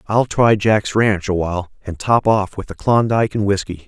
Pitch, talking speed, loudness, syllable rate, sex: 105 Hz, 200 wpm, -17 LUFS, 5.0 syllables/s, male